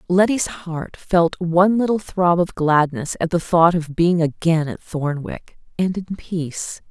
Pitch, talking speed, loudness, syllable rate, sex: 170 Hz, 165 wpm, -19 LUFS, 4.2 syllables/s, female